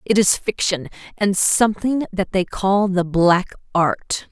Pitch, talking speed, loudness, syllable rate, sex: 190 Hz, 155 wpm, -19 LUFS, 3.8 syllables/s, female